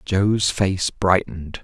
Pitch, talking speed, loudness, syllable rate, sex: 95 Hz, 110 wpm, -20 LUFS, 3.3 syllables/s, male